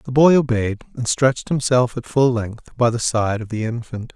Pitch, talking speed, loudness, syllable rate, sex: 120 Hz, 215 wpm, -19 LUFS, 5.0 syllables/s, male